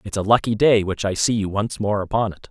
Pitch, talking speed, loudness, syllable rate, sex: 105 Hz, 285 wpm, -20 LUFS, 5.8 syllables/s, male